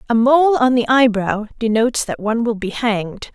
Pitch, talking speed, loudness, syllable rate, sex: 235 Hz, 195 wpm, -16 LUFS, 5.3 syllables/s, female